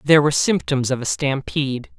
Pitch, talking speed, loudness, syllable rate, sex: 130 Hz, 180 wpm, -20 LUFS, 6.0 syllables/s, male